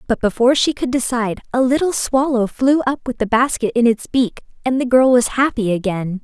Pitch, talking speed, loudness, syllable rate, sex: 245 Hz, 210 wpm, -17 LUFS, 5.4 syllables/s, female